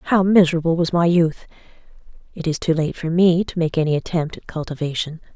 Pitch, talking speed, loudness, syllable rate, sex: 165 Hz, 190 wpm, -19 LUFS, 5.8 syllables/s, female